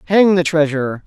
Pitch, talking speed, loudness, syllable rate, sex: 165 Hz, 170 wpm, -15 LUFS, 5.8 syllables/s, male